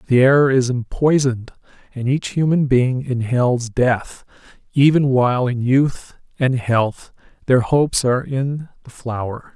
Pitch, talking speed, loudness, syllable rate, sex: 130 Hz, 140 wpm, -18 LUFS, 4.2 syllables/s, male